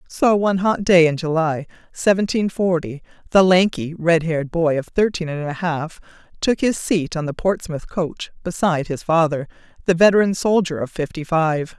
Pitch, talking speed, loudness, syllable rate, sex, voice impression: 170 Hz, 175 wpm, -19 LUFS, 5.0 syllables/s, female, feminine, slightly gender-neutral, adult-like, slightly middle-aged, thin, slightly tensed, slightly weak, bright, slightly soft, clear, fluent, slightly cute, slightly cool, intellectual, slightly refreshing, slightly sincere, slightly calm, slightly friendly, reassuring, unique, elegant, slightly sweet, slightly lively, kind